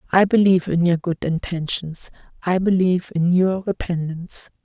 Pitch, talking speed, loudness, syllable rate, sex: 175 Hz, 140 wpm, -20 LUFS, 5.2 syllables/s, female